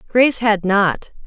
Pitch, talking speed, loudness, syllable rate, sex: 210 Hz, 145 wpm, -16 LUFS, 4.2 syllables/s, female